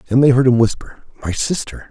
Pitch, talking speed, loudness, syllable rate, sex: 125 Hz, 220 wpm, -16 LUFS, 6.0 syllables/s, male